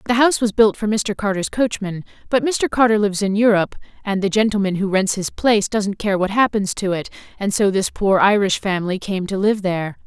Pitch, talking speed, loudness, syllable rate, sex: 205 Hz, 220 wpm, -19 LUFS, 5.7 syllables/s, female